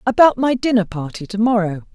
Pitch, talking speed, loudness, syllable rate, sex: 215 Hz, 185 wpm, -17 LUFS, 5.6 syllables/s, female